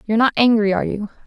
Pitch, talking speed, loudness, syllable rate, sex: 215 Hz, 235 wpm, -17 LUFS, 8.3 syllables/s, female